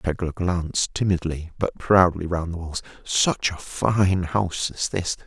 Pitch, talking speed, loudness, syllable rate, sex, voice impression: 85 Hz, 150 wpm, -23 LUFS, 4.1 syllables/s, male, very masculine, adult-like, cool, slightly sincere